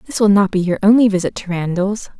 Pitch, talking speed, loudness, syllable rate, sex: 200 Hz, 245 wpm, -15 LUFS, 6.2 syllables/s, female